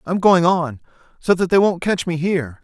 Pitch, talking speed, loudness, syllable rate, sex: 170 Hz, 205 wpm, -18 LUFS, 5.2 syllables/s, male